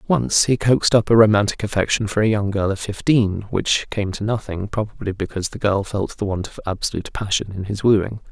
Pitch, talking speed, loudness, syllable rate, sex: 105 Hz, 215 wpm, -20 LUFS, 5.8 syllables/s, male